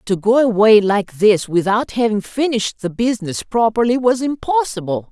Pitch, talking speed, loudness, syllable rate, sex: 220 Hz, 150 wpm, -16 LUFS, 5.0 syllables/s, female